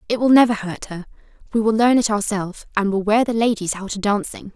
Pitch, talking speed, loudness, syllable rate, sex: 210 Hz, 235 wpm, -19 LUFS, 5.7 syllables/s, female